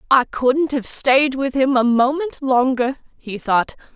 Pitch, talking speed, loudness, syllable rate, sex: 260 Hz, 165 wpm, -18 LUFS, 3.8 syllables/s, female